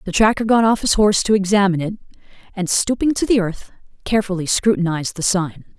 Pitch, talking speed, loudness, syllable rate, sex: 200 Hz, 185 wpm, -18 LUFS, 6.4 syllables/s, female